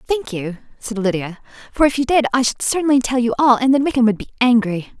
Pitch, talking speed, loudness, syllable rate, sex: 245 Hz, 240 wpm, -17 LUFS, 6.2 syllables/s, female